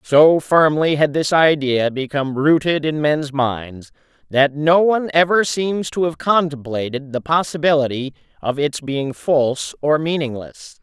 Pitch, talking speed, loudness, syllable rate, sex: 150 Hz, 145 wpm, -18 LUFS, 4.3 syllables/s, male